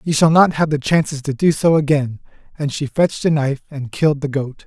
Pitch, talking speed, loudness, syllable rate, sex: 145 Hz, 245 wpm, -17 LUFS, 5.8 syllables/s, male